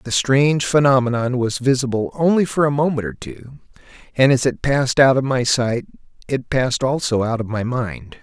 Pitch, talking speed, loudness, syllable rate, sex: 130 Hz, 190 wpm, -18 LUFS, 5.1 syllables/s, male